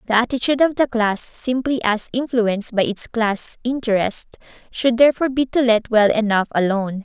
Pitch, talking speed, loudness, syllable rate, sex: 230 Hz, 170 wpm, -19 LUFS, 5.4 syllables/s, female